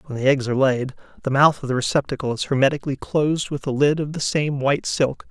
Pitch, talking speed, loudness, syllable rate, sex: 140 Hz, 235 wpm, -21 LUFS, 6.4 syllables/s, male